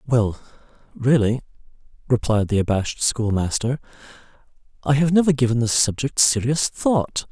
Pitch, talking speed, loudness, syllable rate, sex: 125 Hz, 115 wpm, -20 LUFS, 4.9 syllables/s, male